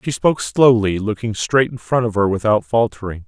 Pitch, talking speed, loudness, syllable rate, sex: 110 Hz, 200 wpm, -17 LUFS, 5.4 syllables/s, male